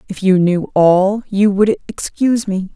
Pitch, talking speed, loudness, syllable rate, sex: 200 Hz, 175 wpm, -15 LUFS, 4.3 syllables/s, female